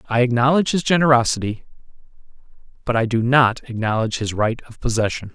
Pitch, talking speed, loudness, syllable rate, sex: 120 Hz, 145 wpm, -19 LUFS, 6.3 syllables/s, male